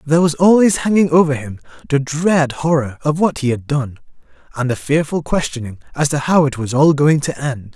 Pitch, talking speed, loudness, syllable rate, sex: 145 Hz, 210 wpm, -16 LUFS, 5.4 syllables/s, male